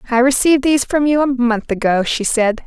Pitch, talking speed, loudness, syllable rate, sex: 250 Hz, 225 wpm, -15 LUFS, 5.7 syllables/s, female